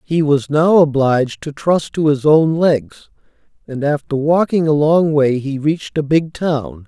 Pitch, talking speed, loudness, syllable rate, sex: 150 Hz, 185 wpm, -15 LUFS, 4.2 syllables/s, male